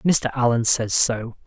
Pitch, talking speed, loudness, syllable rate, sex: 120 Hz, 165 wpm, -20 LUFS, 3.8 syllables/s, male